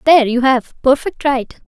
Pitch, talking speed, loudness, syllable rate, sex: 265 Hz, 180 wpm, -15 LUFS, 4.7 syllables/s, female